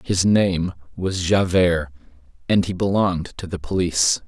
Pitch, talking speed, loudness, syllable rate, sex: 90 Hz, 140 wpm, -20 LUFS, 4.4 syllables/s, male